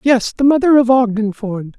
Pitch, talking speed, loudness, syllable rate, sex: 235 Hz, 200 wpm, -14 LUFS, 4.9 syllables/s, male